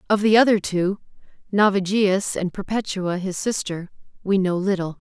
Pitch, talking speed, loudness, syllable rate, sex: 195 Hz, 140 wpm, -21 LUFS, 4.7 syllables/s, female